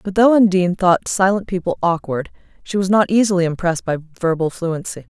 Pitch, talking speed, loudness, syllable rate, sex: 185 Hz, 175 wpm, -17 LUFS, 5.6 syllables/s, female